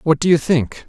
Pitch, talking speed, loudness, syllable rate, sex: 150 Hz, 275 wpm, -16 LUFS, 5.2 syllables/s, male